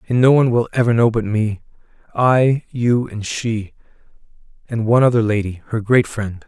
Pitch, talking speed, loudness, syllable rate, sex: 115 Hz, 165 wpm, -17 LUFS, 5.0 syllables/s, male